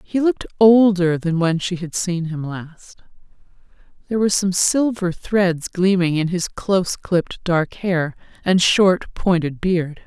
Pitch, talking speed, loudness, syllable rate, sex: 180 Hz, 150 wpm, -19 LUFS, 4.2 syllables/s, female